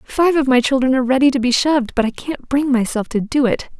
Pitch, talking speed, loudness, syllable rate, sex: 260 Hz, 270 wpm, -16 LUFS, 6.1 syllables/s, female